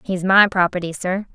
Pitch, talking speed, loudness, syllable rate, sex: 185 Hz, 180 wpm, -18 LUFS, 5.0 syllables/s, female